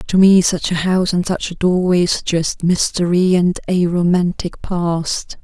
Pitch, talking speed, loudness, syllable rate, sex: 175 Hz, 165 wpm, -16 LUFS, 4.2 syllables/s, female